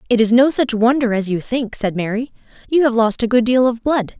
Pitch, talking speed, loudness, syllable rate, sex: 240 Hz, 260 wpm, -16 LUFS, 5.5 syllables/s, female